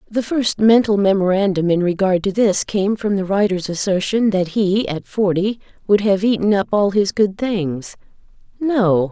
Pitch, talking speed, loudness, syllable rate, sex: 200 Hz, 170 wpm, -17 LUFS, 4.5 syllables/s, female